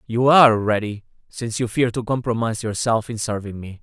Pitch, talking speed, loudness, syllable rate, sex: 115 Hz, 190 wpm, -20 LUFS, 6.1 syllables/s, male